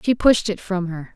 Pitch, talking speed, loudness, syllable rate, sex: 195 Hz, 260 wpm, -20 LUFS, 4.8 syllables/s, female